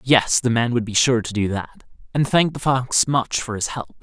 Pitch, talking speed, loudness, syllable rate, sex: 120 Hz, 255 wpm, -20 LUFS, 5.0 syllables/s, male